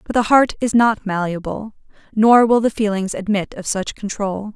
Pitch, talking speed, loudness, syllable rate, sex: 210 Hz, 185 wpm, -18 LUFS, 4.8 syllables/s, female